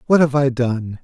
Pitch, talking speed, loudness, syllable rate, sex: 130 Hz, 235 wpm, -17 LUFS, 4.6 syllables/s, male